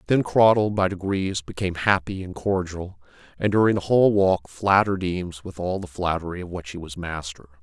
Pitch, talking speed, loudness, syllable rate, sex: 90 Hz, 190 wpm, -23 LUFS, 5.5 syllables/s, male